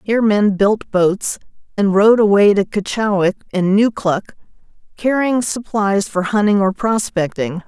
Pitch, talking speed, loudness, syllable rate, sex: 205 Hz, 135 wpm, -16 LUFS, 4.5 syllables/s, female